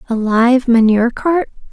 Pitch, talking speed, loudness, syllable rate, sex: 245 Hz, 140 wpm, -13 LUFS, 4.6 syllables/s, female